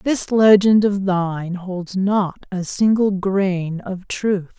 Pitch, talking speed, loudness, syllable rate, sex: 195 Hz, 145 wpm, -19 LUFS, 3.1 syllables/s, female